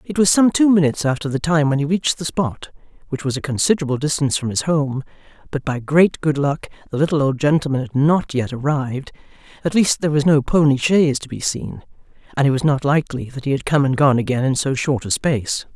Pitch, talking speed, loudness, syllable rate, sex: 145 Hz, 230 wpm, -18 LUFS, 6.2 syllables/s, female